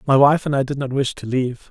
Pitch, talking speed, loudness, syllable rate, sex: 135 Hz, 315 wpm, -19 LUFS, 6.2 syllables/s, male